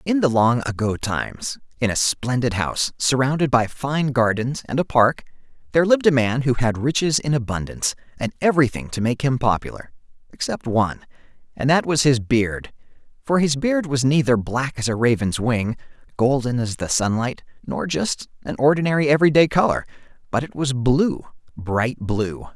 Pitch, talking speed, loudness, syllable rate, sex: 130 Hz, 175 wpm, -20 LUFS, 5.1 syllables/s, male